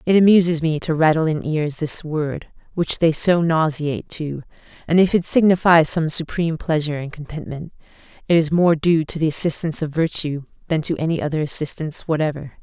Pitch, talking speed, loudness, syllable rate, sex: 160 Hz, 180 wpm, -19 LUFS, 5.6 syllables/s, female